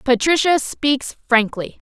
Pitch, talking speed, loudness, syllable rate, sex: 265 Hz, 95 wpm, -18 LUFS, 3.6 syllables/s, female